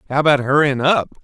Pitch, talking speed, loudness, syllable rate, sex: 140 Hz, 195 wpm, -16 LUFS, 5.0 syllables/s, male